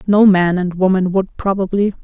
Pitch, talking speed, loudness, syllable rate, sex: 190 Hz, 175 wpm, -15 LUFS, 4.9 syllables/s, female